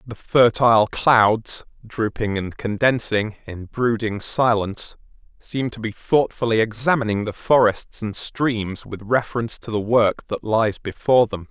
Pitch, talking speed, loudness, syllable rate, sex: 110 Hz, 140 wpm, -20 LUFS, 4.3 syllables/s, male